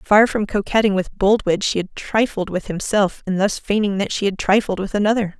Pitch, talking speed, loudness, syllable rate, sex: 200 Hz, 210 wpm, -19 LUFS, 5.4 syllables/s, female